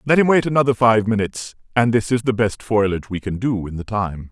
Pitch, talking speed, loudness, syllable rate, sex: 110 Hz, 250 wpm, -19 LUFS, 6.0 syllables/s, male